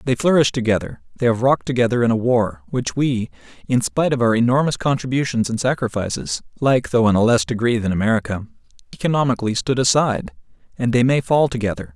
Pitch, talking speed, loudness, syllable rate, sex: 125 Hz, 180 wpm, -19 LUFS, 6.2 syllables/s, male